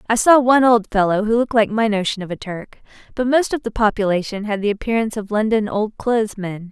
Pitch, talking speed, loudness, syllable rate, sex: 215 Hz, 230 wpm, -18 LUFS, 6.2 syllables/s, female